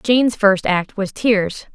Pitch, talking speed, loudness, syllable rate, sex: 210 Hz, 170 wpm, -17 LUFS, 3.6 syllables/s, female